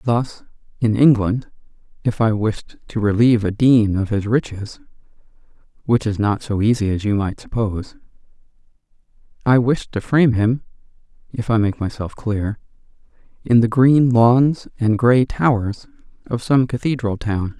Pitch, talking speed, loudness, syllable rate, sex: 115 Hz, 145 wpm, -18 LUFS, 3.8 syllables/s, male